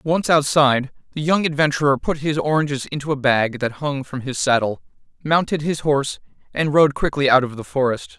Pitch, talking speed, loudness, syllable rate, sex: 140 Hz, 190 wpm, -19 LUFS, 5.5 syllables/s, male